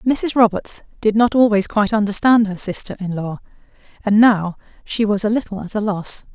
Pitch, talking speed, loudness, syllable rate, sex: 210 Hz, 190 wpm, -18 LUFS, 5.2 syllables/s, female